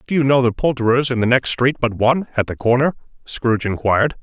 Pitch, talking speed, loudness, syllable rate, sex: 125 Hz, 225 wpm, -17 LUFS, 6.3 syllables/s, male